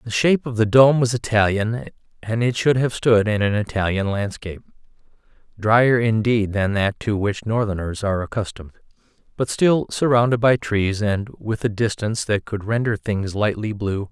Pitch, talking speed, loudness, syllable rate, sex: 110 Hz, 170 wpm, -20 LUFS, 5.0 syllables/s, male